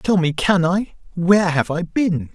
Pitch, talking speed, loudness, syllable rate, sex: 175 Hz, 180 wpm, -18 LUFS, 4.4 syllables/s, male